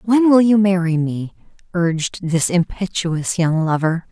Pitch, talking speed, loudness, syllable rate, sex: 175 Hz, 145 wpm, -17 LUFS, 4.2 syllables/s, female